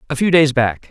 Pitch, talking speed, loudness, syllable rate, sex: 135 Hz, 265 wpm, -15 LUFS, 5.6 syllables/s, male